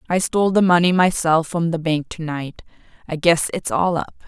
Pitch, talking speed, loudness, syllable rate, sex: 170 Hz, 210 wpm, -19 LUFS, 5.2 syllables/s, female